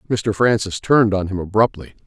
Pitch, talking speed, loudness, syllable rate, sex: 105 Hz, 175 wpm, -18 LUFS, 5.6 syllables/s, male